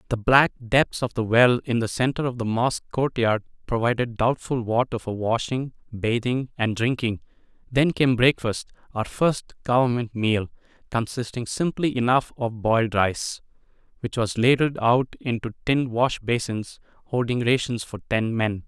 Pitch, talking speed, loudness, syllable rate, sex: 120 Hz, 145 wpm, -23 LUFS, 4.5 syllables/s, male